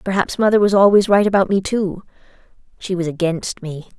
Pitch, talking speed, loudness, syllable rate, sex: 190 Hz, 180 wpm, -17 LUFS, 5.5 syllables/s, female